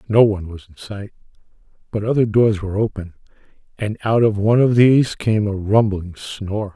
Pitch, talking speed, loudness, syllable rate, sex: 105 Hz, 180 wpm, -18 LUFS, 6.2 syllables/s, male